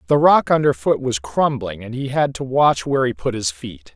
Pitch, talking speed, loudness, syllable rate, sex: 125 Hz, 230 wpm, -19 LUFS, 5.0 syllables/s, male